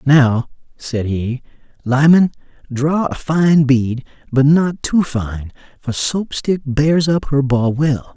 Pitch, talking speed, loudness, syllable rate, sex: 140 Hz, 145 wpm, -16 LUFS, 3.3 syllables/s, male